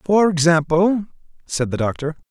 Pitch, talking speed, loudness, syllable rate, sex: 165 Hz, 130 wpm, -19 LUFS, 4.7 syllables/s, male